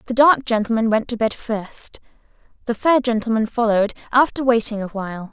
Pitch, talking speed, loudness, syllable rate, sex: 230 Hz, 170 wpm, -19 LUFS, 5.6 syllables/s, female